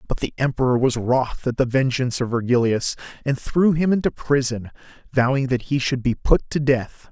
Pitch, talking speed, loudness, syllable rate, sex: 130 Hz, 195 wpm, -21 LUFS, 5.1 syllables/s, male